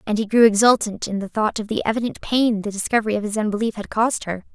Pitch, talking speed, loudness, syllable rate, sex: 215 Hz, 250 wpm, -20 LUFS, 6.7 syllables/s, female